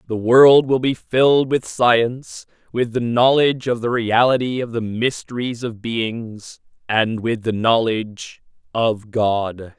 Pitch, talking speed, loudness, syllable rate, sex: 115 Hz, 145 wpm, -18 LUFS, 3.9 syllables/s, male